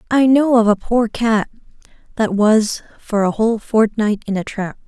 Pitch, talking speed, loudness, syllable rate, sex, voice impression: 220 Hz, 185 wpm, -16 LUFS, 4.6 syllables/s, female, feminine, slightly adult-like, slightly cute, slightly calm, slightly friendly, slightly kind